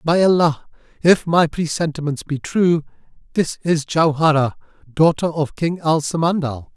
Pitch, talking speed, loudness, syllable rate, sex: 160 Hz, 135 wpm, -18 LUFS, 4.4 syllables/s, male